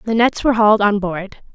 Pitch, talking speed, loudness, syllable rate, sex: 210 Hz, 235 wpm, -15 LUFS, 6.8 syllables/s, female